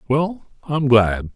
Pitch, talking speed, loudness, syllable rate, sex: 135 Hz, 180 wpm, -18 LUFS, 4.0 syllables/s, male